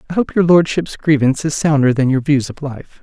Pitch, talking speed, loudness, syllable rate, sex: 145 Hz, 240 wpm, -15 LUFS, 5.7 syllables/s, male